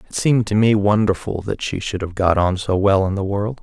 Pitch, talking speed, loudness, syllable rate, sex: 100 Hz, 265 wpm, -18 LUFS, 5.4 syllables/s, male